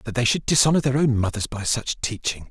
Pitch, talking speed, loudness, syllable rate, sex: 125 Hz, 240 wpm, -22 LUFS, 5.9 syllables/s, male